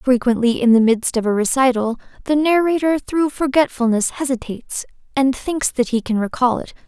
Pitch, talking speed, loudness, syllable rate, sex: 255 Hz, 165 wpm, -18 LUFS, 5.2 syllables/s, female